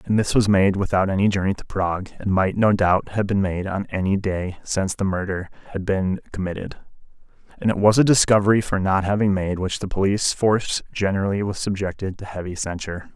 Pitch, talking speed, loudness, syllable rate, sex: 95 Hz, 200 wpm, -21 LUFS, 5.8 syllables/s, male